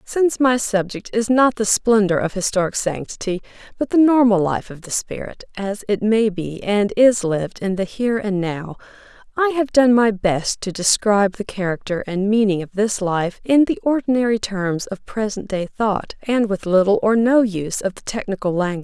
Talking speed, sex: 200 wpm, female